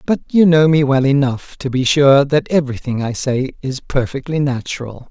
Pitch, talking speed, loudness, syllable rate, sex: 140 Hz, 200 wpm, -16 LUFS, 4.9 syllables/s, male